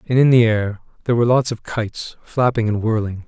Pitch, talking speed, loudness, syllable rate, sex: 115 Hz, 220 wpm, -18 LUFS, 5.9 syllables/s, male